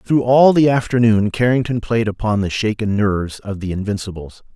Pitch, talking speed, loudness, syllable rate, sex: 110 Hz, 170 wpm, -17 LUFS, 5.3 syllables/s, male